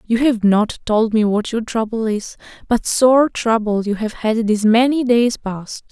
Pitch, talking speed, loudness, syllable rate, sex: 225 Hz, 195 wpm, -17 LUFS, 4.3 syllables/s, female